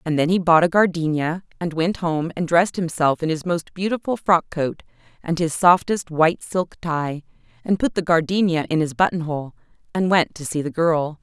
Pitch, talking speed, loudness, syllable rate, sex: 165 Hz, 200 wpm, -21 LUFS, 5.0 syllables/s, female